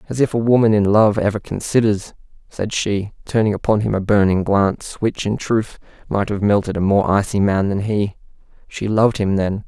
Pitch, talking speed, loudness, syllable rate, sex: 105 Hz, 200 wpm, -18 LUFS, 5.2 syllables/s, male